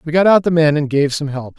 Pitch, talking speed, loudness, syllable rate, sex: 155 Hz, 340 wpm, -15 LUFS, 6.1 syllables/s, male